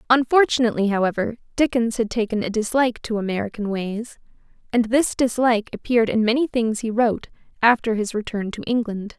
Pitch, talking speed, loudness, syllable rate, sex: 225 Hz, 155 wpm, -21 LUFS, 5.9 syllables/s, female